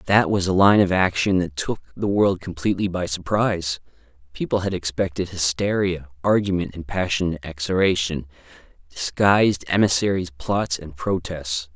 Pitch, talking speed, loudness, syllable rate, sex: 90 Hz, 135 wpm, -22 LUFS, 5.0 syllables/s, male